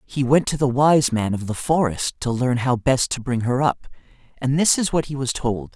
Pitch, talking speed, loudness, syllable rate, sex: 130 Hz, 250 wpm, -20 LUFS, 5.0 syllables/s, male